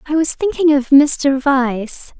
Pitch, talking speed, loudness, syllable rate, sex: 285 Hz, 165 wpm, -15 LUFS, 3.6 syllables/s, female